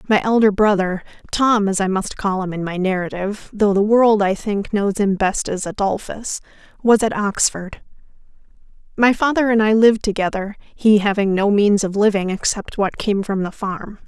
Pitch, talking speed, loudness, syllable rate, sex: 205 Hz, 175 wpm, -18 LUFS, 4.9 syllables/s, female